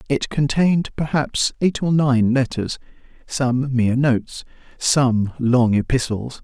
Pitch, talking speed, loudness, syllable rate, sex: 130 Hz, 110 wpm, -19 LUFS, 4.1 syllables/s, male